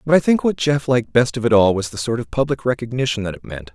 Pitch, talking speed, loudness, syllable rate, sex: 120 Hz, 305 wpm, -18 LUFS, 6.6 syllables/s, male